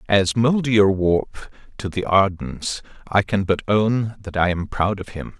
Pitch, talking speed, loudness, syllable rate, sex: 100 Hz, 165 wpm, -20 LUFS, 4.1 syllables/s, male